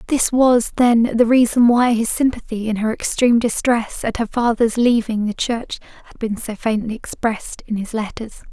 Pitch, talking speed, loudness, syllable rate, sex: 230 Hz, 185 wpm, -18 LUFS, 4.8 syllables/s, female